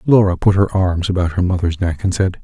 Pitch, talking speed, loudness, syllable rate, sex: 90 Hz, 245 wpm, -16 LUFS, 5.6 syllables/s, male